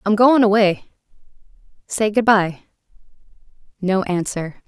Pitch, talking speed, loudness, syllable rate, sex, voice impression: 200 Hz, 105 wpm, -18 LUFS, 4.2 syllables/s, female, feminine, middle-aged, tensed, slightly dark, clear, intellectual, calm, elegant, sharp, modest